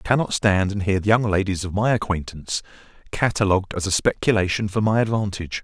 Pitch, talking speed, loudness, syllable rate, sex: 100 Hz, 190 wpm, -21 LUFS, 6.4 syllables/s, male